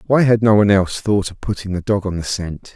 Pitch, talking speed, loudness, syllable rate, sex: 100 Hz, 285 wpm, -17 LUFS, 6.2 syllables/s, male